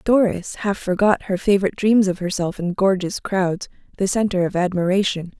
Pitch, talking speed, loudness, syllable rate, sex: 190 Hz, 165 wpm, -20 LUFS, 5.2 syllables/s, female